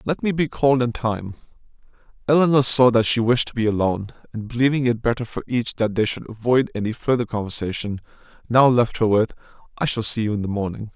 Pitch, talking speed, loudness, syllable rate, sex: 115 Hz, 210 wpm, -21 LUFS, 6.1 syllables/s, male